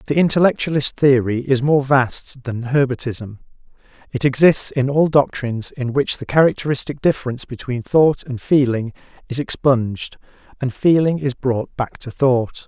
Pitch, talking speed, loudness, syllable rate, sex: 135 Hz, 145 wpm, -18 LUFS, 4.8 syllables/s, male